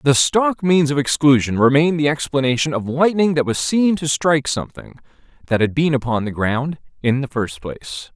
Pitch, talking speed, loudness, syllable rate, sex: 140 Hz, 185 wpm, -18 LUFS, 5.3 syllables/s, male